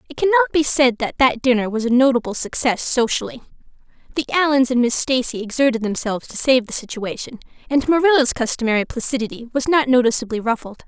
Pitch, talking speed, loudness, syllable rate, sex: 250 Hz, 170 wpm, -18 LUFS, 6.6 syllables/s, female